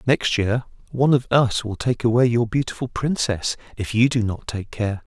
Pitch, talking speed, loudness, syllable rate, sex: 115 Hz, 200 wpm, -21 LUFS, 5.0 syllables/s, male